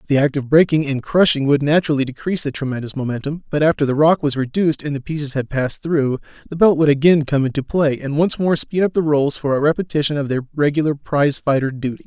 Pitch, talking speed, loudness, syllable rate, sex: 145 Hz, 235 wpm, -18 LUFS, 6.4 syllables/s, male